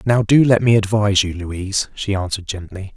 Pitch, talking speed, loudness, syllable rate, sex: 100 Hz, 205 wpm, -17 LUFS, 5.7 syllables/s, male